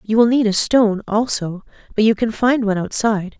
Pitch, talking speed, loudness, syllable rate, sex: 215 Hz, 210 wpm, -17 LUFS, 5.8 syllables/s, female